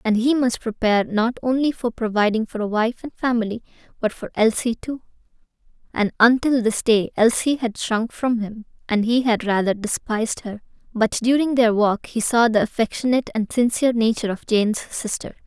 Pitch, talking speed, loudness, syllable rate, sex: 230 Hz, 180 wpm, -21 LUFS, 5.3 syllables/s, female